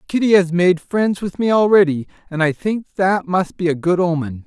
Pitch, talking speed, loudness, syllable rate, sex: 180 Hz, 215 wpm, -17 LUFS, 4.9 syllables/s, male